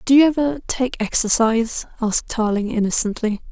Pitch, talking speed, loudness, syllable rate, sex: 235 Hz, 135 wpm, -19 LUFS, 5.5 syllables/s, female